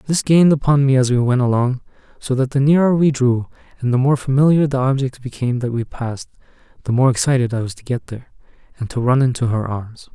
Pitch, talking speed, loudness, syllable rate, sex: 130 Hz, 220 wpm, -17 LUFS, 6.2 syllables/s, male